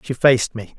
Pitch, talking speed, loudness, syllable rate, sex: 120 Hz, 230 wpm, -18 LUFS, 5.9 syllables/s, male